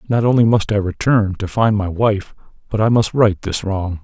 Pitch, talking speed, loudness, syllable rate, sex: 105 Hz, 225 wpm, -17 LUFS, 4.9 syllables/s, male